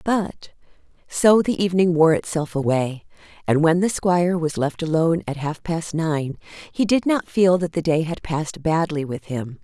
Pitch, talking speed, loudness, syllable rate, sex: 165 Hz, 185 wpm, -21 LUFS, 4.8 syllables/s, female